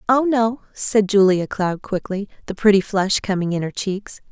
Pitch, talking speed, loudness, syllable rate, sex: 200 Hz, 180 wpm, -19 LUFS, 4.5 syllables/s, female